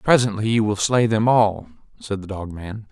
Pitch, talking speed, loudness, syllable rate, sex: 105 Hz, 205 wpm, -20 LUFS, 4.9 syllables/s, male